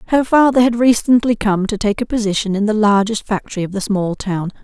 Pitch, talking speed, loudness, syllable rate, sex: 215 Hz, 220 wpm, -16 LUFS, 5.8 syllables/s, female